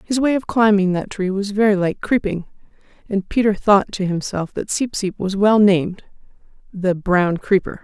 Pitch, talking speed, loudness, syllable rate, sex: 200 Hz, 185 wpm, -18 LUFS, 4.8 syllables/s, female